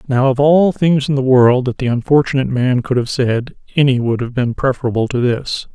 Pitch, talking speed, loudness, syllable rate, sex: 130 Hz, 220 wpm, -15 LUFS, 5.5 syllables/s, male